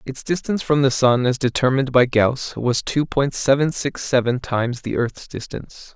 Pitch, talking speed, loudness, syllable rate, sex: 130 Hz, 190 wpm, -20 LUFS, 5.0 syllables/s, male